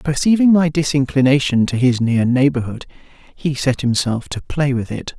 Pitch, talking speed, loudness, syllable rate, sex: 135 Hz, 160 wpm, -17 LUFS, 4.9 syllables/s, male